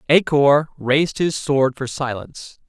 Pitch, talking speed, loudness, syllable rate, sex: 145 Hz, 155 wpm, -18 LUFS, 4.3 syllables/s, male